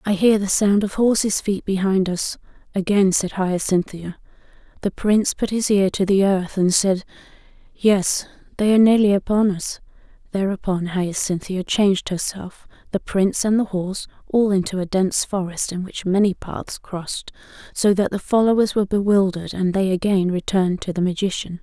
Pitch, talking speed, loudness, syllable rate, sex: 195 Hz, 165 wpm, -20 LUFS, 5.1 syllables/s, female